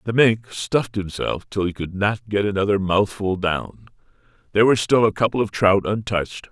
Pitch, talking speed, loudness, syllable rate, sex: 105 Hz, 185 wpm, -21 LUFS, 5.3 syllables/s, male